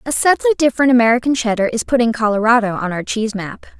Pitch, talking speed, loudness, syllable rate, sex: 235 Hz, 190 wpm, -16 LUFS, 6.9 syllables/s, female